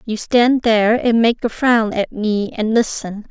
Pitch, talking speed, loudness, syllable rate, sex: 225 Hz, 200 wpm, -16 LUFS, 4.1 syllables/s, female